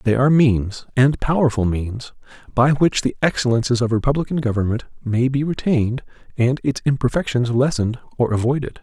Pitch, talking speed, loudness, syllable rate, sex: 125 Hz, 150 wpm, -19 LUFS, 5.7 syllables/s, male